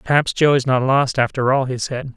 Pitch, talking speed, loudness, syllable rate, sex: 130 Hz, 250 wpm, -18 LUFS, 5.4 syllables/s, male